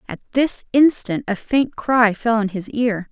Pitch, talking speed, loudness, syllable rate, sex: 230 Hz, 195 wpm, -19 LUFS, 4.2 syllables/s, female